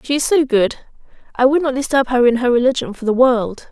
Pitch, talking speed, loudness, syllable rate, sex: 255 Hz, 225 wpm, -16 LUFS, 5.4 syllables/s, female